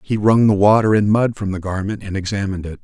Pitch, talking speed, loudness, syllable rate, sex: 100 Hz, 255 wpm, -17 LUFS, 6.3 syllables/s, male